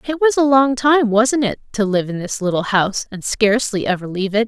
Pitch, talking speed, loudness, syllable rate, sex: 225 Hz, 215 wpm, -17 LUFS, 5.7 syllables/s, female